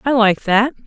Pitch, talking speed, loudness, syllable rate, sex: 230 Hz, 210 wpm, -15 LUFS, 4.6 syllables/s, female